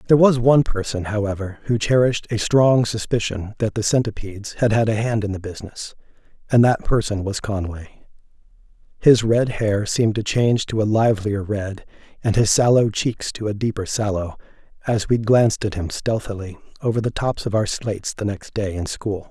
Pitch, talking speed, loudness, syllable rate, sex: 110 Hz, 185 wpm, -20 LUFS, 5.4 syllables/s, male